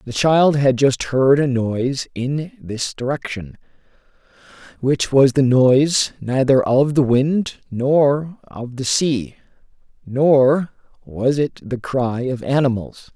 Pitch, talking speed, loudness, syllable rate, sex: 130 Hz, 130 wpm, -18 LUFS, 3.5 syllables/s, male